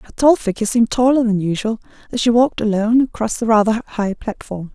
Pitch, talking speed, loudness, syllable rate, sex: 225 Hz, 200 wpm, -17 LUFS, 6.2 syllables/s, female